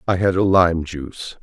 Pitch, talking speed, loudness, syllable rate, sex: 90 Hz, 210 wpm, -18 LUFS, 4.8 syllables/s, male